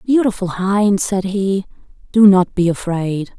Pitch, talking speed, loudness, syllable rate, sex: 195 Hz, 140 wpm, -16 LUFS, 3.9 syllables/s, female